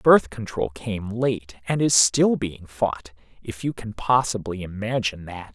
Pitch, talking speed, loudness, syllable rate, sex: 105 Hz, 150 wpm, -23 LUFS, 4.1 syllables/s, male